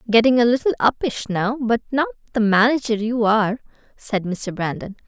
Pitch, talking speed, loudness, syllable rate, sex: 225 Hz, 165 wpm, -20 LUFS, 5.3 syllables/s, female